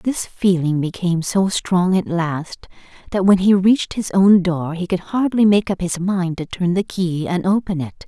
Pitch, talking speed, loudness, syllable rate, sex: 185 Hz, 210 wpm, -18 LUFS, 4.5 syllables/s, female